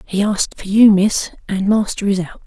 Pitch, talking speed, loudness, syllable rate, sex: 200 Hz, 220 wpm, -16 LUFS, 5.1 syllables/s, female